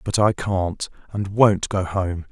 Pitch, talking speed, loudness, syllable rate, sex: 95 Hz, 180 wpm, -21 LUFS, 3.5 syllables/s, male